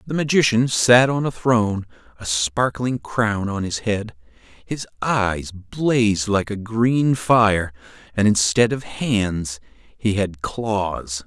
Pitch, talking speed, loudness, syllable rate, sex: 105 Hz, 140 wpm, -20 LUFS, 3.3 syllables/s, male